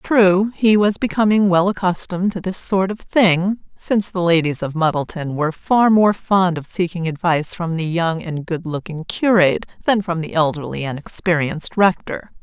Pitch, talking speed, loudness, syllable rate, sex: 180 Hz, 180 wpm, -18 LUFS, 4.9 syllables/s, female